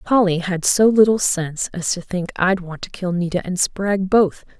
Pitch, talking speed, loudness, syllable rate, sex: 185 Hz, 210 wpm, -19 LUFS, 4.9 syllables/s, female